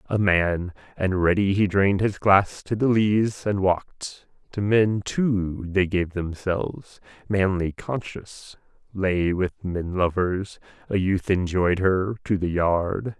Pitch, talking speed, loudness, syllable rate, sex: 95 Hz, 145 wpm, -23 LUFS, 3.6 syllables/s, male